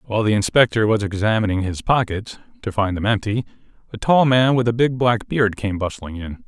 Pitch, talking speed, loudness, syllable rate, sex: 110 Hz, 195 wpm, -19 LUFS, 5.6 syllables/s, male